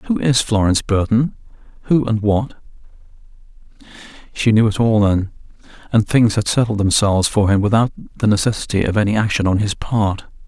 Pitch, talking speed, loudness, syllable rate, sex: 110 Hz, 160 wpm, -17 LUFS, 5.4 syllables/s, male